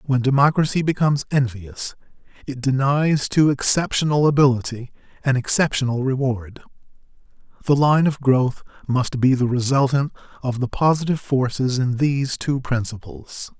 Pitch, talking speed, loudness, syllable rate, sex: 135 Hz, 125 wpm, -20 LUFS, 5.0 syllables/s, male